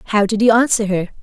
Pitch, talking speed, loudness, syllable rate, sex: 215 Hz, 245 wpm, -15 LUFS, 5.4 syllables/s, female